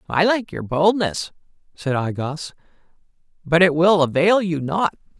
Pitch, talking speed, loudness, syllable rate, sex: 170 Hz, 150 wpm, -19 LUFS, 4.3 syllables/s, male